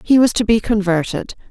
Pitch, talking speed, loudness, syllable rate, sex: 215 Hz, 200 wpm, -16 LUFS, 5.4 syllables/s, female